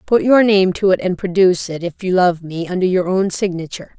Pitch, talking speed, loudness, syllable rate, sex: 185 Hz, 240 wpm, -16 LUFS, 5.7 syllables/s, female